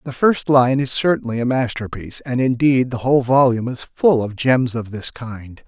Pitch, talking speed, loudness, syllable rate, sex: 125 Hz, 200 wpm, -18 LUFS, 5.1 syllables/s, male